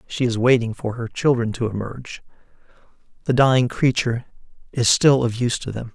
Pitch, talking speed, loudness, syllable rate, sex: 120 Hz, 170 wpm, -20 LUFS, 5.8 syllables/s, male